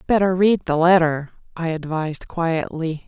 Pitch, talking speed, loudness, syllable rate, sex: 170 Hz, 135 wpm, -20 LUFS, 4.6 syllables/s, female